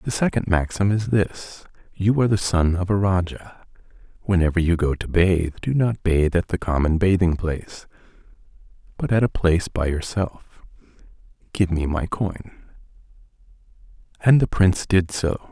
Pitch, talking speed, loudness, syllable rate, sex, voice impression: 90 Hz, 155 wpm, -21 LUFS, 4.9 syllables/s, male, masculine, adult-like, relaxed, slightly weak, dark, soft, slightly muffled, cool, calm, mature, wild, lively, strict, modest